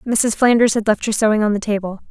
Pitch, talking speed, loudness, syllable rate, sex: 215 Hz, 255 wpm, -17 LUFS, 6.4 syllables/s, female